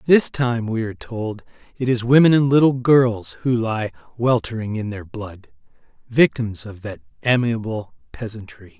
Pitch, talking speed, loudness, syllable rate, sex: 115 Hz, 150 wpm, -20 LUFS, 4.5 syllables/s, male